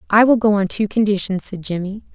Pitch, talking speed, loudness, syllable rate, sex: 205 Hz, 225 wpm, -18 LUFS, 5.9 syllables/s, female